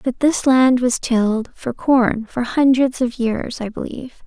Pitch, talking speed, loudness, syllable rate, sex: 250 Hz, 185 wpm, -18 LUFS, 4.1 syllables/s, female